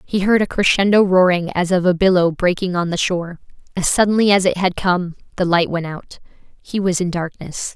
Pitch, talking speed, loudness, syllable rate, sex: 180 Hz, 210 wpm, -17 LUFS, 5.4 syllables/s, female